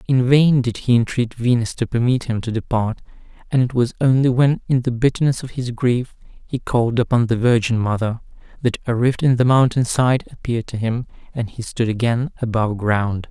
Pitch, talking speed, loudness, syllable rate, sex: 120 Hz, 200 wpm, -19 LUFS, 5.3 syllables/s, male